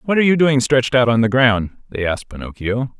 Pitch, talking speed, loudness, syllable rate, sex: 125 Hz, 240 wpm, -17 LUFS, 6.5 syllables/s, male